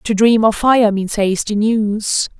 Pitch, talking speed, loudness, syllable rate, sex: 215 Hz, 175 wpm, -15 LUFS, 3.5 syllables/s, female